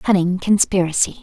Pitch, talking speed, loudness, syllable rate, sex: 185 Hz, 145 wpm, -17 LUFS, 6.1 syllables/s, female